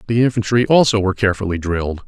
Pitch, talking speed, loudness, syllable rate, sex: 105 Hz, 175 wpm, -17 LUFS, 7.5 syllables/s, male